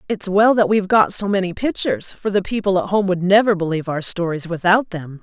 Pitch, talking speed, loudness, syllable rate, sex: 190 Hz, 230 wpm, -18 LUFS, 5.9 syllables/s, female